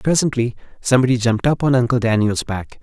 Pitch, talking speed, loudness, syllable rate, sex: 125 Hz, 170 wpm, -18 LUFS, 6.5 syllables/s, male